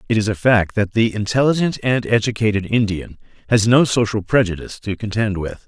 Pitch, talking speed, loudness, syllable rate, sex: 110 Hz, 180 wpm, -18 LUFS, 5.6 syllables/s, male